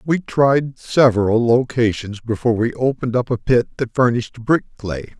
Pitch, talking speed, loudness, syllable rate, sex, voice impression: 120 Hz, 160 wpm, -18 LUFS, 5.1 syllables/s, male, very masculine, very adult-like, thick, cool, sincere, calm, slightly mature, slightly elegant